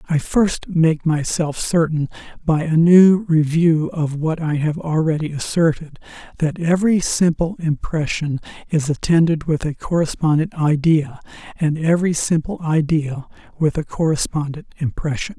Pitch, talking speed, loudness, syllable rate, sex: 160 Hz, 130 wpm, -19 LUFS, 4.5 syllables/s, male